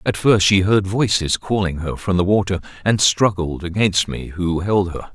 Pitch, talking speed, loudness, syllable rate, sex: 95 Hz, 200 wpm, -18 LUFS, 4.6 syllables/s, male